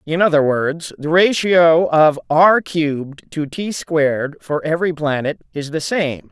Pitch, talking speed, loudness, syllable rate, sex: 160 Hz, 160 wpm, -17 LUFS, 4.1 syllables/s, male